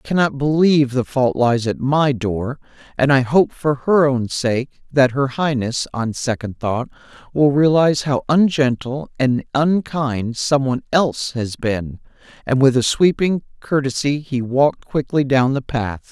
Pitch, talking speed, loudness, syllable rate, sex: 135 Hz, 165 wpm, -18 LUFS, 4.3 syllables/s, male